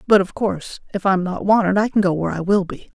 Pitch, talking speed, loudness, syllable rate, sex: 195 Hz, 280 wpm, -19 LUFS, 6.4 syllables/s, female